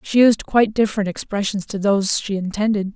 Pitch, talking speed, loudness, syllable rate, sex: 205 Hz, 185 wpm, -19 LUFS, 6.0 syllables/s, female